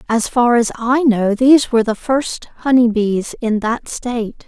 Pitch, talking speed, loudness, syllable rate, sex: 235 Hz, 190 wpm, -16 LUFS, 4.3 syllables/s, female